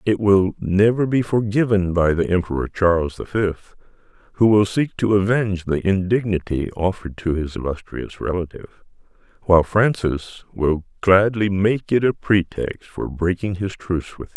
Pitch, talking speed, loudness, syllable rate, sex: 95 Hz, 155 wpm, -20 LUFS, 4.9 syllables/s, male